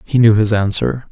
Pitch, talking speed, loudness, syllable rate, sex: 110 Hz, 215 wpm, -14 LUFS, 5.0 syllables/s, male